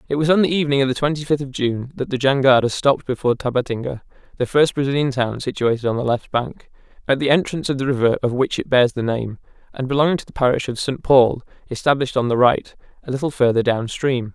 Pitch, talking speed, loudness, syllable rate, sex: 130 Hz, 230 wpm, -19 LUFS, 6.5 syllables/s, male